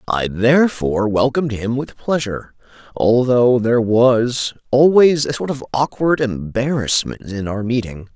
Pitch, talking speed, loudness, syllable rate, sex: 120 Hz, 130 wpm, -17 LUFS, 4.5 syllables/s, male